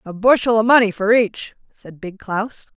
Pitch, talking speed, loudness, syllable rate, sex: 215 Hz, 195 wpm, -16 LUFS, 4.5 syllables/s, female